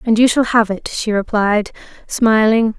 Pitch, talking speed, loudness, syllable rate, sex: 220 Hz, 170 wpm, -15 LUFS, 4.4 syllables/s, female